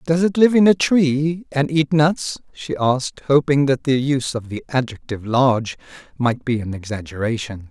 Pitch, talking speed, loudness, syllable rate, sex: 135 Hz, 180 wpm, -19 LUFS, 5.0 syllables/s, male